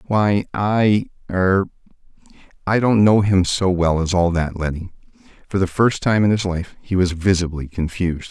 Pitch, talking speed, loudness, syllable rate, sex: 95 Hz, 160 wpm, -19 LUFS, 4.7 syllables/s, male